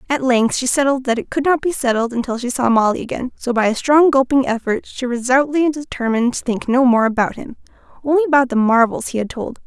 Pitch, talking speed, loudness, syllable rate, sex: 255 Hz, 230 wpm, -17 LUFS, 6.2 syllables/s, female